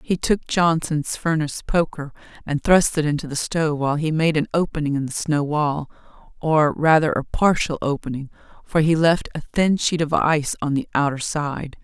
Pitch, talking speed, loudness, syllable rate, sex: 155 Hz, 190 wpm, -21 LUFS, 5.1 syllables/s, female